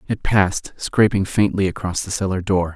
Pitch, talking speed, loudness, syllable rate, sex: 95 Hz, 175 wpm, -20 LUFS, 5.1 syllables/s, male